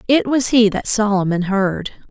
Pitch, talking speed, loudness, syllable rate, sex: 215 Hz, 170 wpm, -16 LUFS, 4.5 syllables/s, female